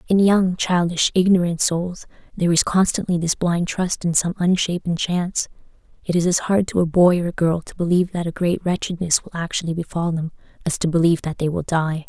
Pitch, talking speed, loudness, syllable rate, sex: 175 Hz, 205 wpm, -20 LUFS, 5.5 syllables/s, female